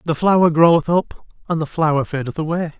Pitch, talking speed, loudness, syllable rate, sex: 160 Hz, 195 wpm, -17 LUFS, 5.9 syllables/s, male